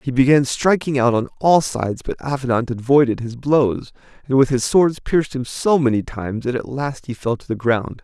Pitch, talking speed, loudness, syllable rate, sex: 130 Hz, 215 wpm, -19 LUFS, 5.2 syllables/s, male